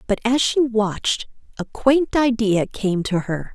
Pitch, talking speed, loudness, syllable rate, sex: 225 Hz, 170 wpm, -20 LUFS, 3.9 syllables/s, female